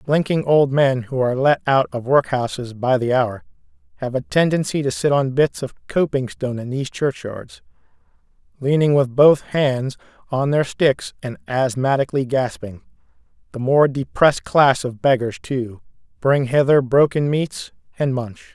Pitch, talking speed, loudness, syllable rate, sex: 135 Hz, 155 wpm, -19 LUFS, 4.6 syllables/s, male